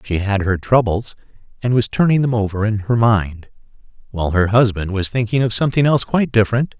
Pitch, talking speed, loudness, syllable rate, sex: 110 Hz, 195 wpm, -17 LUFS, 6.1 syllables/s, male